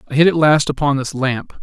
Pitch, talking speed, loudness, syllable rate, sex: 140 Hz, 260 wpm, -16 LUFS, 5.7 syllables/s, male